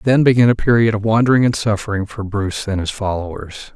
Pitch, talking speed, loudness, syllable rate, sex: 105 Hz, 210 wpm, -16 LUFS, 6.1 syllables/s, male